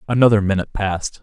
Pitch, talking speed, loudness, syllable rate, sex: 105 Hz, 145 wpm, -18 LUFS, 7.5 syllables/s, male